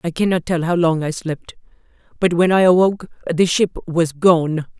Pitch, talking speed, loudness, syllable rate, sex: 170 Hz, 190 wpm, -17 LUFS, 4.9 syllables/s, female